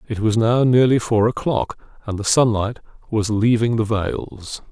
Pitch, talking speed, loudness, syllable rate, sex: 110 Hz, 165 wpm, -19 LUFS, 4.4 syllables/s, male